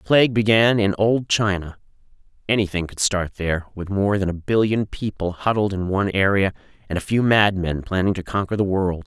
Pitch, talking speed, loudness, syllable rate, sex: 100 Hz, 190 wpm, -21 LUFS, 5.4 syllables/s, male